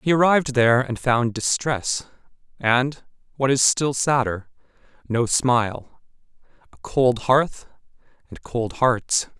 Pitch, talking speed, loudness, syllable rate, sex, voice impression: 125 Hz, 120 wpm, -21 LUFS, 3.8 syllables/s, male, masculine, adult-like, slightly powerful, slightly halting, raspy, cool, sincere, friendly, reassuring, wild, lively, kind